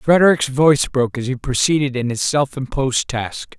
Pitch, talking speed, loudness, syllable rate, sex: 135 Hz, 185 wpm, -18 LUFS, 5.4 syllables/s, male